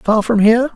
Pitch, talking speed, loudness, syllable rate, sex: 225 Hz, 240 wpm, -13 LUFS, 5.9 syllables/s, male